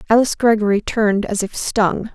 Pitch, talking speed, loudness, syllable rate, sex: 215 Hz, 170 wpm, -17 LUFS, 5.7 syllables/s, female